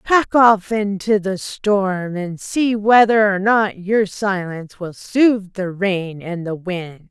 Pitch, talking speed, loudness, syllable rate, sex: 200 Hz, 160 wpm, -18 LUFS, 3.4 syllables/s, female